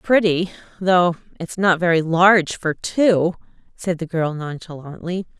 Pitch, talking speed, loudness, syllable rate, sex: 175 Hz, 135 wpm, -19 LUFS, 4.2 syllables/s, female